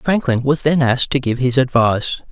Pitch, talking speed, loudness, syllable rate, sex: 130 Hz, 210 wpm, -16 LUFS, 5.4 syllables/s, male